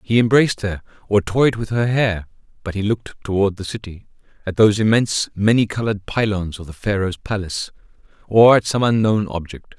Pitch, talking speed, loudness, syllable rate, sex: 105 Hz, 180 wpm, -19 LUFS, 5.7 syllables/s, male